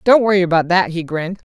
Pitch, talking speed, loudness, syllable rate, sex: 180 Hz, 235 wpm, -16 LUFS, 6.7 syllables/s, female